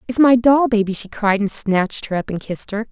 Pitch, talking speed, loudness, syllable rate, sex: 220 Hz, 270 wpm, -17 LUFS, 5.8 syllables/s, female